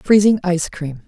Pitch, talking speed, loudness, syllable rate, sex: 180 Hz, 165 wpm, -17 LUFS, 5.1 syllables/s, female